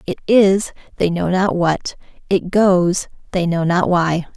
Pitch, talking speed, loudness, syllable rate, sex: 180 Hz, 165 wpm, -17 LUFS, 3.8 syllables/s, female